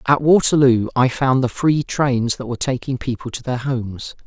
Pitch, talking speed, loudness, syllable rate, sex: 130 Hz, 195 wpm, -18 LUFS, 5.0 syllables/s, male